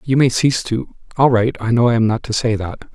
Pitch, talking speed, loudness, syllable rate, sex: 120 Hz, 285 wpm, -17 LUFS, 5.7 syllables/s, male